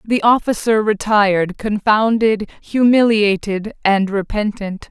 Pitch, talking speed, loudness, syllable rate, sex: 210 Hz, 85 wpm, -16 LUFS, 3.9 syllables/s, female